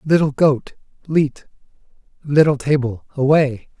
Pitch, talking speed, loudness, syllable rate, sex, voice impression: 140 Hz, 95 wpm, -18 LUFS, 4.1 syllables/s, male, masculine, adult-like, cool, intellectual, calm, slightly friendly